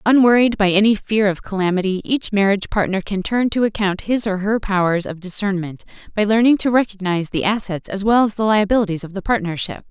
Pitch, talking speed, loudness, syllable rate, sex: 200 Hz, 200 wpm, -18 LUFS, 6.0 syllables/s, female